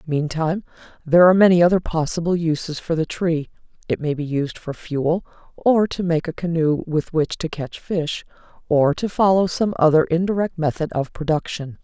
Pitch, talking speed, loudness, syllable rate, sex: 165 Hz, 175 wpm, -20 LUFS, 5.2 syllables/s, female